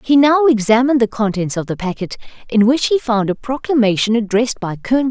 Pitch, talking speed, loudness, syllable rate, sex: 235 Hz, 200 wpm, -16 LUFS, 5.7 syllables/s, female